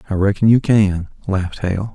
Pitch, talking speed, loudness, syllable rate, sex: 100 Hz, 185 wpm, -17 LUFS, 5.1 syllables/s, male